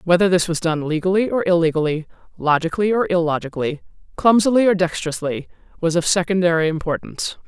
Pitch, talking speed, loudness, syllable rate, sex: 175 Hz, 135 wpm, -19 LUFS, 6.5 syllables/s, female